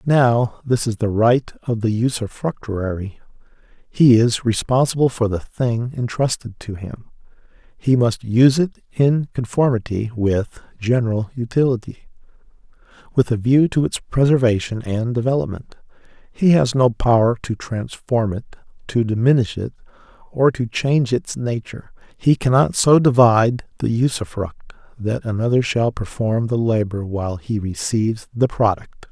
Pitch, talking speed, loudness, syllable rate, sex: 120 Hz, 135 wpm, -19 LUFS, 4.6 syllables/s, male